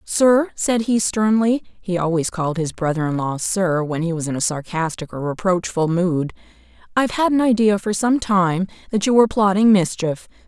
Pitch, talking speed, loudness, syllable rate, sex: 190 Hz, 180 wpm, -19 LUFS, 5.0 syllables/s, female